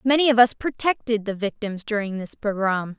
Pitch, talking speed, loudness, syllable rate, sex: 220 Hz, 180 wpm, -22 LUFS, 5.2 syllables/s, female